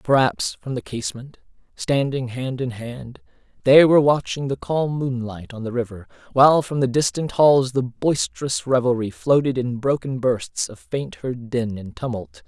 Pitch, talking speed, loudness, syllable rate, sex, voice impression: 125 Hz, 170 wpm, -21 LUFS, 4.6 syllables/s, male, masculine, adult-like, tensed, slightly powerful, bright, clear, fluent, intellectual, friendly, slightly unique, lively, slightly sharp